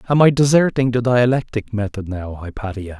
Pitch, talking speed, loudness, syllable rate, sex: 115 Hz, 160 wpm, -18 LUFS, 5.4 syllables/s, male